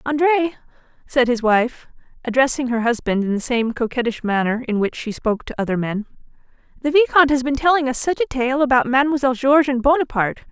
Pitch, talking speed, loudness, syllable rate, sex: 255 Hz, 190 wpm, -19 LUFS, 6.3 syllables/s, female